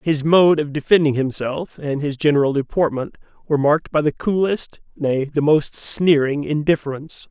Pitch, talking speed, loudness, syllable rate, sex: 150 Hz, 155 wpm, -19 LUFS, 5.0 syllables/s, male